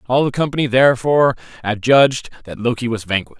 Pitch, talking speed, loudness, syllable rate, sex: 125 Hz, 160 wpm, -16 LUFS, 6.7 syllables/s, male